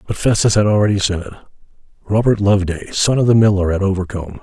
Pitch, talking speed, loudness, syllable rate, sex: 100 Hz, 175 wpm, -16 LUFS, 7.2 syllables/s, male